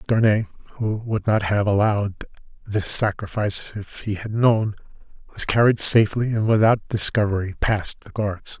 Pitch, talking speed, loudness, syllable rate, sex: 105 Hz, 145 wpm, -21 LUFS, 4.9 syllables/s, male